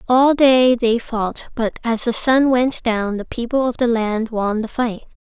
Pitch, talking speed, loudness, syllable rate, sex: 235 Hz, 205 wpm, -18 LUFS, 4.0 syllables/s, female